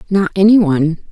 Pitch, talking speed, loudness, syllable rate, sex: 185 Hz, 160 wpm, -12 LUFS, 5.9 syllables/s, female